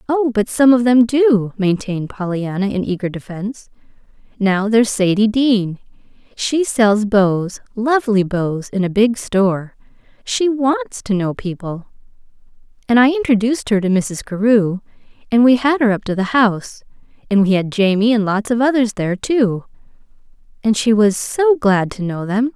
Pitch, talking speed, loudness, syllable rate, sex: 220 Hz, 160 wpm, -16 LUFS, 4.7 syllables/s, female